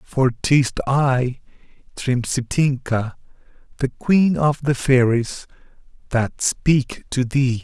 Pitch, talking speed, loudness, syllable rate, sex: 130 Hz, 100 wpm, -20 LUFS, 3.1 syllables/s, male